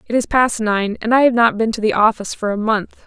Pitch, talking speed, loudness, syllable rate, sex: 225 Hz, 295 wpm, -17 LUFS, 5.8 syllables/s, female